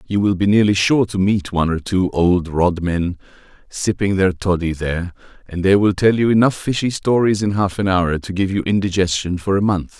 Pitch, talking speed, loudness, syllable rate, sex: 95 Hz, 215 wpm, -17 LUFS, 5.2 syllables/s, male